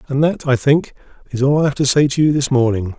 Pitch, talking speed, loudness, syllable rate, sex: 140 Hz, 280 wpm, -16 LUFS, 6.1 syllables/s, male